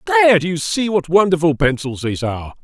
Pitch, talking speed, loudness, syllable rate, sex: 150 Hz, 205 wpm, -16 LUFS, 6.2 syllables/s, male